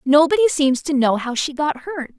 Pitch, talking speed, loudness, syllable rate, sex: 295 Hz, 220 wpm, -18 LUFS, 5.1 syllables/s, female